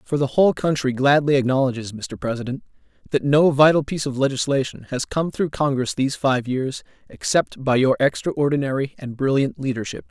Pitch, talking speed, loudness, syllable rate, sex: 135 Hz, 165 wpm, -21 LUFS, 5.6 syllables/s, male